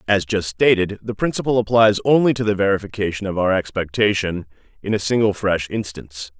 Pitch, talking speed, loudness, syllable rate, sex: 100 Hz, 170 wpm, -19 LUFS, 5.8 syllables/s, male